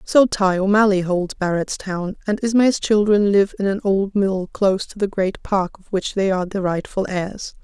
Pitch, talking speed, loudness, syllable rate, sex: 195 Hz, 195 wpm, -19 LUFS, 5.0 syllables/s, female